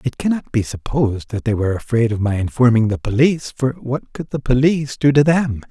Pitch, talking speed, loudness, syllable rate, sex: 125 Hz, 220 wpm, -18 LUFS, 5.8 syllables/s, male